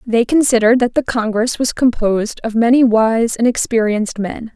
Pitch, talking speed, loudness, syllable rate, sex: 230 Hz, 170 wpm, -15 LUFS, 5.2 syllables/s, female